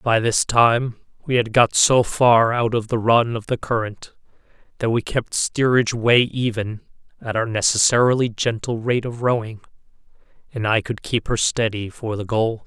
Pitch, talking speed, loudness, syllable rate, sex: 115 Hz, 175 wpm, -19 LUFS, 4.6 syllables/s, male